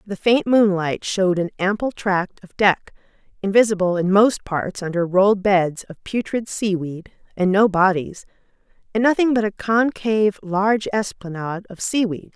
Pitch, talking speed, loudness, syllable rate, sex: 200 Hz, 150 wpm, -20 LUFS, 4.7 syllables/s, female